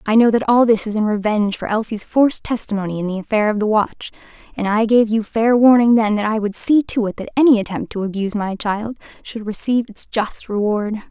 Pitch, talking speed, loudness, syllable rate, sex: 220 Hz, 230 wpm, -17 LUFS, 5.8 syllables/s, female